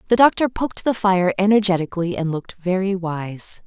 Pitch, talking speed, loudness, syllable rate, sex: 190 Hz, 165 wpm, -20 LUFS, 5.6 syllables/s, female